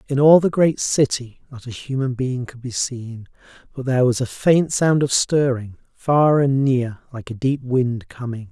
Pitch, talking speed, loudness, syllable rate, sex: 130 Hz, 195 wpm, -19 LUFS, 4.4 syllables/s, male